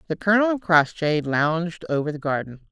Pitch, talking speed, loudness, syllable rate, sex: 165 Hz, 175 wpm, -22 LUFS, 5.7 syllables/s, female